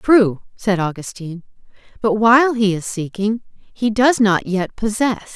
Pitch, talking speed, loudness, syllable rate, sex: 210 Hz, 145 wpm, -18 LUFS, 4.3 syllables/s, female